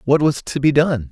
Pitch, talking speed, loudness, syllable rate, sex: 140 Hz, 270 wpm, -17 LUFS, 5.1 syllables/s, male